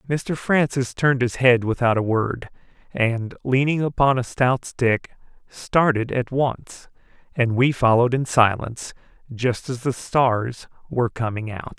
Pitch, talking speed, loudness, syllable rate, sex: 125 Hz, 150 wpm, -21 LUFS, 4.2 syllables/s, male